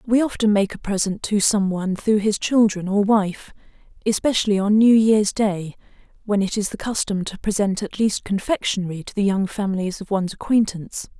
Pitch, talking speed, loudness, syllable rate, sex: 205 Hz, 190 wpm, -20 LUFS, 5.4 syllables/s, female